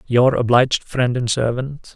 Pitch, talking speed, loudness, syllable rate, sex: 125 Hz, 155 wpm, -18 LUFS, 4.4 syllables/s, male